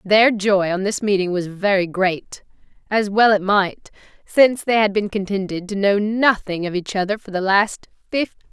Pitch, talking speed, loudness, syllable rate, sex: 200 Hz, 195 wpm, -19 LUFS, 5.0 syllables/s, female